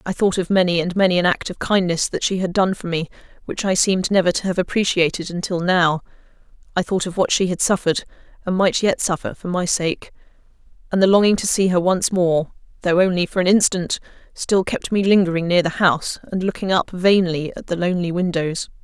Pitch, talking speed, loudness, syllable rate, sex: 180 Hz, 205 wpm, -19 LUFS, 5.7 syllables/s, female